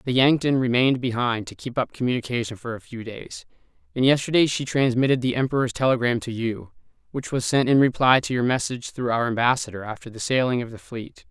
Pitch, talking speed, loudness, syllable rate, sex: 125 Hz, 200 wpm, -23 LUFS, 6.0 syllables/s, male